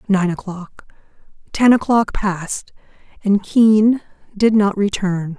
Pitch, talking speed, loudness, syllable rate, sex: 200 Hz, 110 wpm, -17 LUFS, 3.9 syllables/s, female